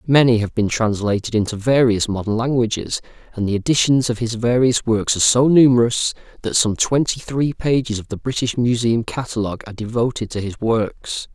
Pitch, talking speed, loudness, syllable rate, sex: 115 Hz, 175 wpm, -18 LUFS, 5.4 syllables/s, male